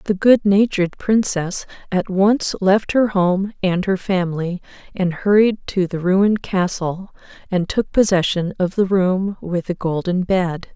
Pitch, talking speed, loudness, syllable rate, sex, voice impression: 190 Hz, 150 wpm, -18 LUFS, 4.2 syllables/s, female, very feminine, slightly young, very adult-like, slightly thin, slightly relaxed, weak, slightly dark, soft, very clear, fluent, slightly cute, cool, very intellectual, refreshing, very sincere, very calm, very friendly, reassuring, slightly unique, very elegant, wild, sweet, slightly lively, kind, slightly intense, modest